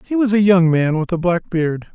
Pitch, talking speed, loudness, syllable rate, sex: 180 Hz, 280 wpm, -16 LUFS, 5.2 syllables/s, male